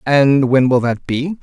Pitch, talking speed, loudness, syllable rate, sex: 135 Hz, 210 wpm, -14 LUFS, 3.9 syllables/s, male